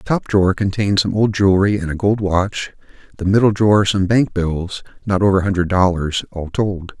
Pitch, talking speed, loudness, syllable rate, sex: 95 Hz, 205 wpm, -17 LUFS, 5.5 syllables/s, male